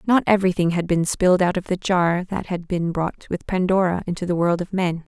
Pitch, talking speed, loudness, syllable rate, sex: 180 Hz, 235 wpm, -21 LUFS, 5.7 syllables/s, female